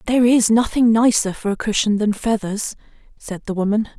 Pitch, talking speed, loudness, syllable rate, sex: 215 Hz, 180 wpm, -18 LUFS, 5.4 syllables/s, female